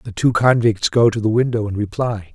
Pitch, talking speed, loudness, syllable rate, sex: 110 Hz, 230 wpm, -17 LUFS, 5.4 syllables/s, male